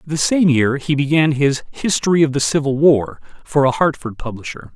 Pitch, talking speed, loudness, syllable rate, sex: 140 Hz, 190 wpm, -17 LUFS, 5.1 syllables/s, male